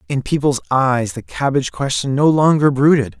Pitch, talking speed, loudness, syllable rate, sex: 135 Hz, 170 wpm, -16 LUFS, 5.1 syllables/s, male